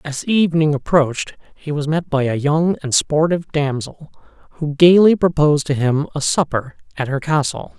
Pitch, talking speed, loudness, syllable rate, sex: 150 Hz, 170 wpm, -17 LUFS, 5.1 syllables/s, male